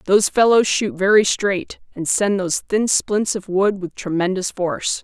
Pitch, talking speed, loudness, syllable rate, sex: 195 Hz, 180 wpm, -18 LUFS, 4.6 syllables/s, female